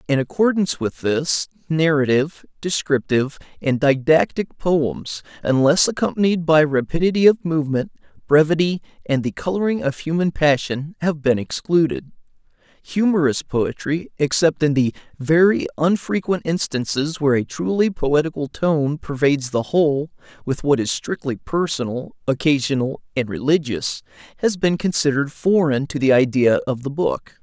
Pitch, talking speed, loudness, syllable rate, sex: 150 Hz, 125 wpm, -20 LUFS, 4.9 syllables/s, male